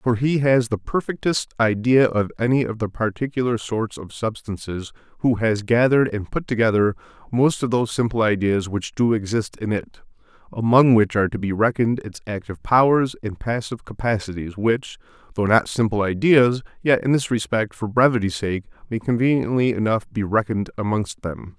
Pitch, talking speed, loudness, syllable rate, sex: 110 Hz, 170 wpm, -21 LUFS, 5.4 syllables/s, male